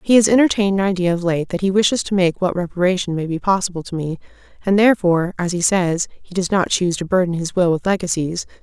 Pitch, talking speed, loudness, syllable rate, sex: 185 Hz, 235 wpm, -18 LUFS, 6.5 syllables/s, female